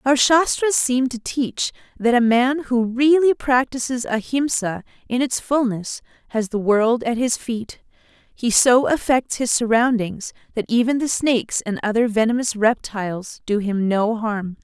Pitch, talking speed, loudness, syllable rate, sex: 235 Hz, 155 wpm, -20 LUFS, 4.3 syllables/s, female